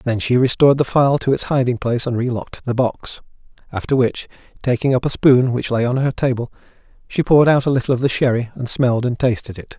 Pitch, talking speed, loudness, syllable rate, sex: 125 Hz, 225 wpm, -17 LUFS, 6.2 syllables/s, male